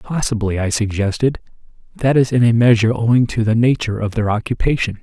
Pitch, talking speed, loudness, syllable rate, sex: 115 Hz, 180 wpm, -17 LUFS, 6.1 syllables/s, male